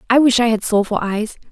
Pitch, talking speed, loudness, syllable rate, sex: 225 Hz, 240 wpm, -17 LUFS, 6.0 syllables/s, female